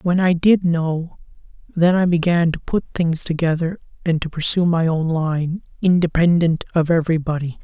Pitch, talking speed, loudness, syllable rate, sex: 165 Hz, 155 wpm, -19 LUFS, 4.8 syllables/s, male